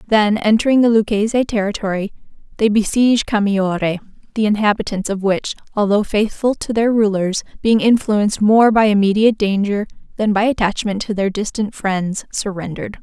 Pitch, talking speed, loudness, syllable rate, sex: 210 Hz, 145 wpm, -17 LUFS, 5.4 syllables/s, female